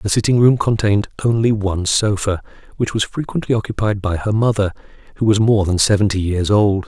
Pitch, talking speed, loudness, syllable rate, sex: 105 Hz, 185 wpm, -17 LUFS, 5.8 syllables/s, male